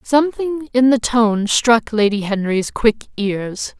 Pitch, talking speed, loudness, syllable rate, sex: 230 Hz, 140 wpm, -17 LUFS, 3.7 syllables/s, female